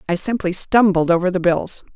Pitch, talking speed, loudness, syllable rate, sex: 185 Hz, 185 wpm, -17 LUFS, 5.3 syllables/s, female